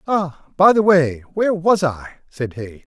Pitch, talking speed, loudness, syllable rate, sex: 160 Hz, 185 wpm, -17 LUFS, 4.3 syllables/s, male